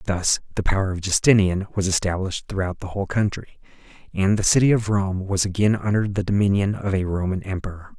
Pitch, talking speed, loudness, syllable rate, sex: 95 Hz, 190 wpm, -22 LUFS, 6.0 syllables/s, male